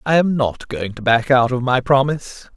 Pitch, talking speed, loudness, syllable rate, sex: 130 Hz, 235 wpm, -17 LUFS, 5.0 syllables/s, male